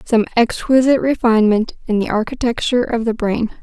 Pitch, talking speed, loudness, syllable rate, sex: 230 Hz, 150 wpm, -16 LUFS, 5.9 syllables/s, female